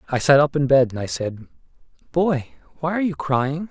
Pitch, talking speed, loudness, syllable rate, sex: 145 Hz, 210 wpm, -20 LUFS, 5.5 syllables/s, male